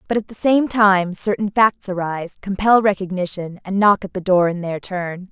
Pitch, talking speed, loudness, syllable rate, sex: 195 Hz, 205 wpm, -18 LUFS, 5.0 syllables/s, female